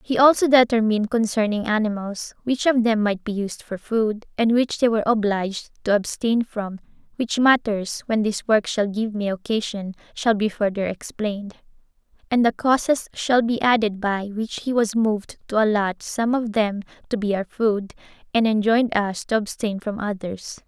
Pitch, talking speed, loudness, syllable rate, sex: 215 Hz, 175 wpm, -22 LUFS, 4.8 syllables/s, female